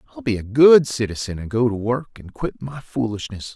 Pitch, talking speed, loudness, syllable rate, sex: 115 Hz, 220 wpm, -20 LUFS, 5.3 syllables/s, male